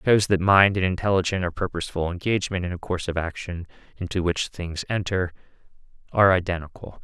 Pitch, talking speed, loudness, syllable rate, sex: 90 Hz, 170 wpm, -23 LUFS, 6.4 syllables/s, male